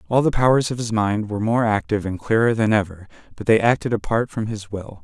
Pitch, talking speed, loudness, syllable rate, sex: 110 Hz, 240 wpm, -20 LUFS, 6.1 syllables/s, male